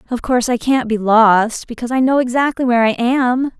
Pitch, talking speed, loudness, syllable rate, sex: 240 Hz, 215 wpm, -15 LUFS, 5.7 syllables/s, female